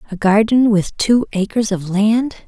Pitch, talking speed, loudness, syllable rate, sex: 210 Hz, 170 wpm, -16 LUFS, 4.3 syllables/s, female